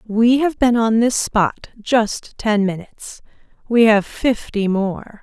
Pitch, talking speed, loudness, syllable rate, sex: 220 Hz, 150 wpm, -17 LUFS, 3.5 syllables/s, female